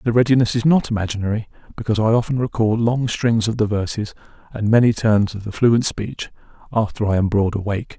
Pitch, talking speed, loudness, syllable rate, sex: 110 Hz, 195 wpm, -19 LUFS, 6.0 syllables/s, male